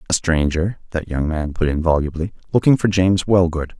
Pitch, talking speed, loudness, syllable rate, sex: 85 Hz, 190 wpm, -19 LUFS, 5.5 syllables/s, male